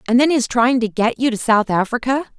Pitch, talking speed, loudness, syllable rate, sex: 240 Hz, 250 wpm, -17 LUFS, 5.5 syllables/s, female